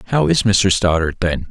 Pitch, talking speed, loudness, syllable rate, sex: 85 Hz, 200 wpm, -16 LUFS, 4.8 syllables/s, male